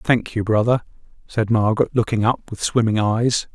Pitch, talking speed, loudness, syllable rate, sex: 110 Hz, 170 wpm, -20 LUFS, 5.0 syllables/s, male